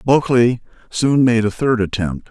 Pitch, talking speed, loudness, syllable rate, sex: 115 Hz, 155 wpm, -16 LUFS, 4.8 syllables/s, male